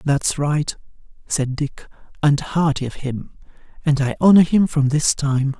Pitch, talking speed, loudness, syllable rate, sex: 145 Hz, 160 wpm, -19 LUFS, 4.1 syllables/s, male